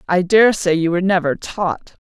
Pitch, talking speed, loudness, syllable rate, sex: 180 Hz, 175 wpm, -16 LUFS, 5.5 syllables/s, female